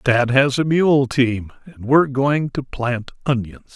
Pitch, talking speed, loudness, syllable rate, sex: 130 Hz, 190 wpm, -18 LUFS, 4.2 syllables/s, male